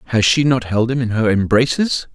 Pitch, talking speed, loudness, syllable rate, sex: 120 Hz, 225 wpm, -16 LUFS, 5.4 syllables/s, male